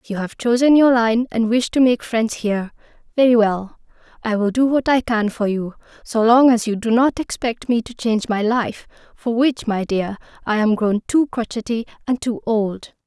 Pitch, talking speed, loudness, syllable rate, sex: 230 Hz, 200 wpm, -19 LUFS, 4.9 syllables/s, female